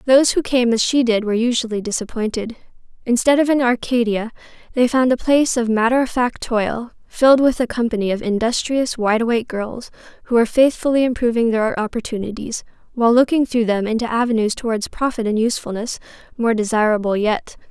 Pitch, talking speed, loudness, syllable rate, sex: 235 Hz, 170 wpm, -18 LUFS, 6.0 syllables/s, female